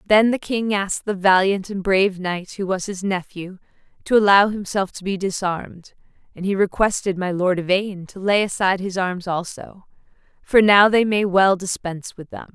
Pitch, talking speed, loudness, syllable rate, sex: 195 Hz, 185 wpm, -19 LUFS, 5.0 syllables/s, female